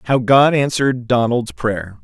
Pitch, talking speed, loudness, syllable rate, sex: 125 Hz, 150 wpm, -16 LUFS, 4.4 syllables/s, male